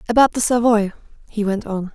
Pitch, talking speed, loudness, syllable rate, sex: 215 Hz, 185 wpm, -18 LUFS, 5.7 syllables/s, female